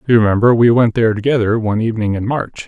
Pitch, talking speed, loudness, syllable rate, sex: 115 Hz, 225 wpm, -14 LUFS, 7.2 syllables/s, male